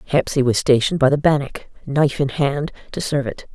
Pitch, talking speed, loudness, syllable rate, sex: 140 Hz, 205 wpm, -19 LUFS, 6.1 syllables/s, female